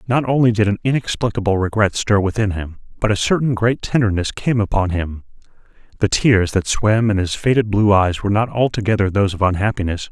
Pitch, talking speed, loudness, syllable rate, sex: 105 Hz, 190 wpm, -18 LUFS, 5.8 syllables/s, male